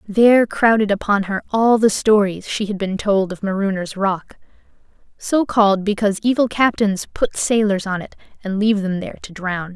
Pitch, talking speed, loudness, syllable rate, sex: 205 Hz, 180 wpm, -18 LUFS, 5.1 syllables/s, female